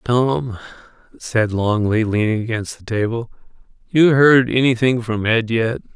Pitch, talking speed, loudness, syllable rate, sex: 115 Hz, 130 wpm, -17 LUFS, 4.2 syllables/s, male